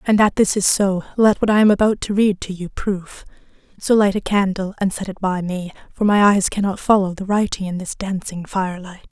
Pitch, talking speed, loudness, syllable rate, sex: 195 Hz, 230 wpm, -18 LUFS, 5.5 syllables/s, female